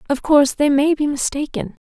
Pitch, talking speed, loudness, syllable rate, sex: 285 Hz, 195 wpm, -17 LUFS, 5.6 syllables/s, female